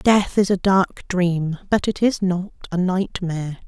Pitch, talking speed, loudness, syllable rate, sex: 185 Hz, 180 wpm, -21 LUFS, 4.0 syllables/s, female